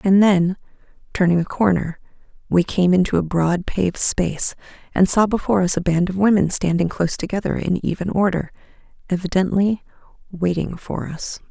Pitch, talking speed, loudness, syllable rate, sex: 185 Hz, 155 wpm, -20 LUFS, 5.4 syllables/s, female